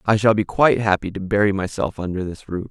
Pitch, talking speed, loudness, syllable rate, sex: 100 Hz, 245 wpm, -20 LUFS, 6.2 syllables/s, male